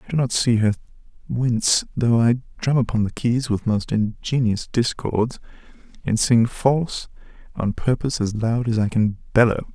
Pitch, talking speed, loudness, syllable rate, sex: 115 Hz, 165 wpm, -21 LUFS, 4.8 syllables/s, male